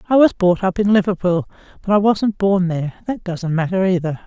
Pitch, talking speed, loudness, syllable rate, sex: 190 Hz, 210 wpm, -18 LUFS, 5.6 syllables/s, female